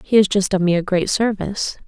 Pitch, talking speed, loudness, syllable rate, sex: 195 Hz, 255 wpm, -18 LUFS, 5.9 syllables/s, female